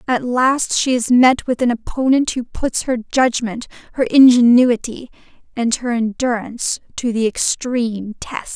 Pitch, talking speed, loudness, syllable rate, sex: 240 Hz, 145 wpm, -17 LUFS, 4.4 syllables/s, female